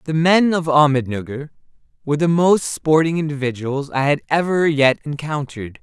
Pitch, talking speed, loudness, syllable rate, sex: 150 Hz, 145 wpm, -18 LUFS, 5.2 syllables/s, male